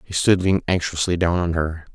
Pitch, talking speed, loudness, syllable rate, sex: 85 Hz, 215 wpm, -20 LUFS, 5.7 syllables/s, male